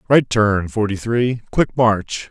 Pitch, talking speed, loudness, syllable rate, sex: 110 Hz, 155 wpm, -18 LUFS, 3.5 syllables/s, male